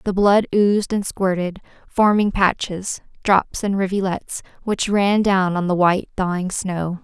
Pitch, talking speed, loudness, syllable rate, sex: 190 Hz, 155 wpm, -19 LUFS, 4.3 syllables/s, female